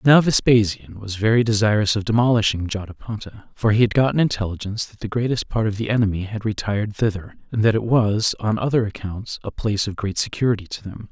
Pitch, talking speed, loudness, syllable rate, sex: 110 Hz, 200 wpm, -21 LUFS, 6.0 syllables/s, male